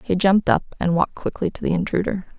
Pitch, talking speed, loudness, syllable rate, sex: 185 Hz, 225 wpm, -21 LUFS, 6.8 syllables/s, female